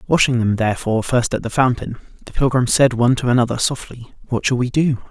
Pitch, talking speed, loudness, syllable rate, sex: 120 Hz, 210 wpm, -18 LUFS, 6.3 syllables/s, male